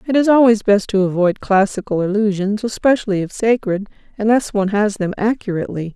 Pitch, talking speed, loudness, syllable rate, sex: 210 Hz, 160 wpm, -17 LUFS, 5.8 syllables/s, female